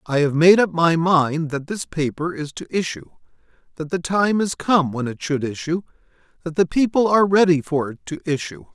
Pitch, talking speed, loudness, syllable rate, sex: 165 Hz, 205 wpm, -20 LUFS, 5.2 syllables/s, male